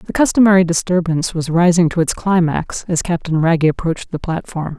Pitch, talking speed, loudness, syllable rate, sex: 170 Hz, 175 wpm, -16 LUFS, 5.7 syllables/s, female